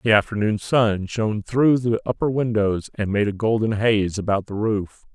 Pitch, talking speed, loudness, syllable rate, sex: 110 Hz, 185 wpm, -21 LUFS, 4.7 syllables/s, male